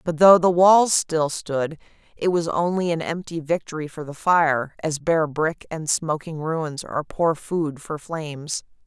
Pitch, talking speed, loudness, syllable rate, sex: 160 Hz, 175 wpm, -22 LUFS, 4.1 syllables/s, female